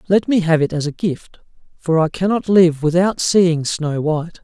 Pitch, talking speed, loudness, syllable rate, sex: 170 Hz, 205 wpm, -17 LUFS, 4.8 syllables/s, male